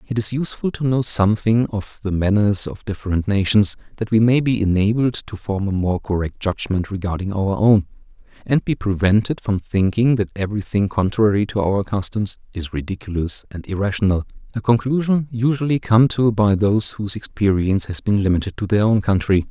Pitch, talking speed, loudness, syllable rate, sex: 105 Hz, 175 wpm, -19 LUFS, 5.4 syllables/s, male